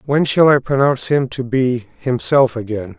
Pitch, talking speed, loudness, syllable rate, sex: 130 Hz, 180 wpm, -16 LUFS, 4.7 syllables/s, male